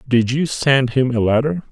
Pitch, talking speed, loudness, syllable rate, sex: 130 Hz, 210 wpm, -17 LUFS, 4.7 syllables/s, male